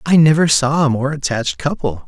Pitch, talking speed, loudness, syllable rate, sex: 140 Hz, 200 wpm, -16 LUFS, 5.7 syllables/s, male